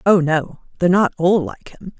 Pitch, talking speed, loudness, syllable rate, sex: 175 Hz, 210 wpm, -17 LUFS, 4.9 syllables/s, female